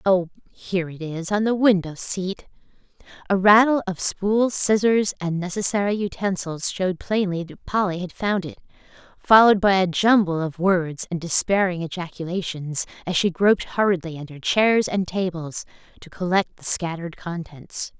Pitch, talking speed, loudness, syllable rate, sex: 185 Hz, 145 wpm, -22 LUFS, 4.8 syllables/s, female